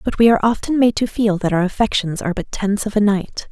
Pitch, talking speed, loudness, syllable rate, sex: 205 Hz, 275 wpm, -18 LUFS, 6.2 syllables/s, female